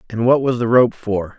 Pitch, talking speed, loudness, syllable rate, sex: 115 Hz, 260 wpm, -16 LUFS, 5.0 syllables/s, male